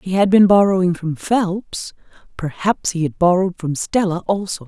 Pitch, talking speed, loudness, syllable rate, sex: 185 Hz, 165 wpm, -17 LUFS, 4.9 syllables/s, female